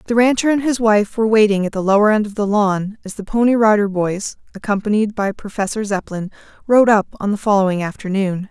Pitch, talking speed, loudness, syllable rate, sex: 210 Hz, 205 wpm, -17 LUFS, 5.9 syllables/s, female